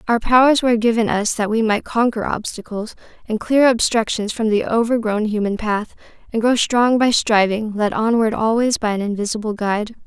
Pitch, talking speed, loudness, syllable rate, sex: 220 Hz, 180 wpm, -18 LUFS, 5.2 syllables/s, female